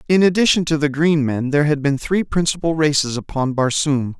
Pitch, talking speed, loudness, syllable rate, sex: 150 Hz, 200 wpm, -18 LUFS, 5.5 syllables/s, male